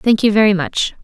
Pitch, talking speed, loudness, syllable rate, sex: 210 Hz, 230 wpm, -14 LUFS, 5.4 syllables/s, female